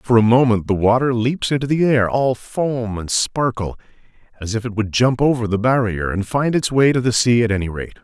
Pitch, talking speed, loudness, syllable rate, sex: 115 Hz, 230 wpm, -18 LUFS, 5.2 syllables/s, male